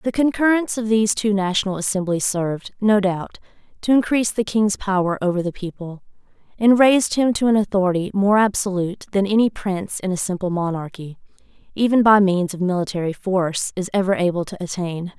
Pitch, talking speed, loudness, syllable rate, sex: 195 Hz, 175 wpm, -20 LUFS, 5.9 syllables/s, female